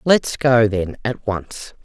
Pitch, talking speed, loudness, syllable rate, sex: 115 Hz, 165 wpm, -19 LUFS, 3.1 syllables/s, female